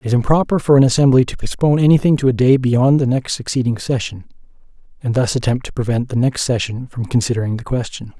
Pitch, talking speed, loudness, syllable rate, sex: 125 Hz, 205 wpm, -16 LUFS, 6.3 syllables/s, male